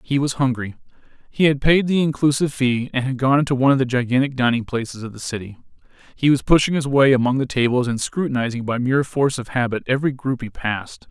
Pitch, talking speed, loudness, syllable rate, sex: 130 Hz, 220 wpm, -20 LUFS, 6.5 syllables/s, male